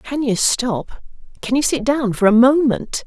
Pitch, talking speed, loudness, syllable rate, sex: 250 Hz, 175 wpm, -17 LUFS, 4.2 syllables/s, female